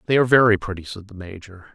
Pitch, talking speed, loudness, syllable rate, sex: 100 Hz, 240 wpm, -17 LUFS, 7.3 syllables/s, male